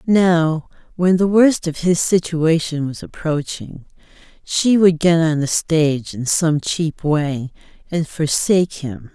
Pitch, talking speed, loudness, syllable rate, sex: 165 Hz, 145 wpm, -17 LUFS, 3.7 syllables/s, female